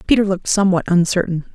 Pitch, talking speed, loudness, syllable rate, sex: 185 Hz, 155 wpm, -17 LUFS, 7.1 syllables/s, female